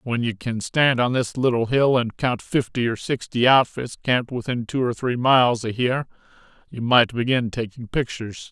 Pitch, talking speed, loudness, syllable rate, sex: 120 Hz, 190 wpm, -21 LUFS, 5.0 syllables/s, male